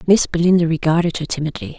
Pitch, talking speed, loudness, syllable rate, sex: 165 Hz, 170 wpm, -17 LUFS, 6.7 syllables/s, female